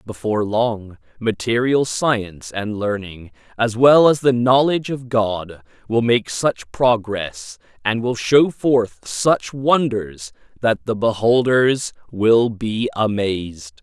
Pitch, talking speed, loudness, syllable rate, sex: 115 Hz, 125 wpm, -18 LUFS, 3.5 syllables/s, male